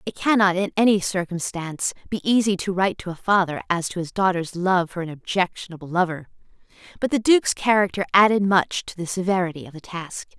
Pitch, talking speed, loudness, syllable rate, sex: 185 Hz, 190 wpm, -22 LUFS, 6.0 syllables/s, female